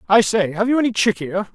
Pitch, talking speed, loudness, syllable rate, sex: 190 Hz, 235 wpm, -18 LUFS, 5.8 syllables/s, male